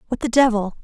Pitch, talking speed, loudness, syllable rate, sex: 230 Hz, 215 wpm, -18 LUFS, 6.7 syllables/s, female